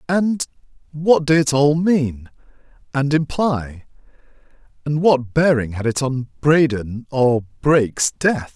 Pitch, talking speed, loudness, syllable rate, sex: 140 Hz, 120 wpm, -18 LUFS, 3.7 syllables/s, male